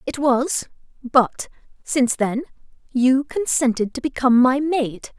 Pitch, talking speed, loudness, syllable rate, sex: 260 Hz, 125 wpm, -20 LUFS, 4.1 syllables/s, female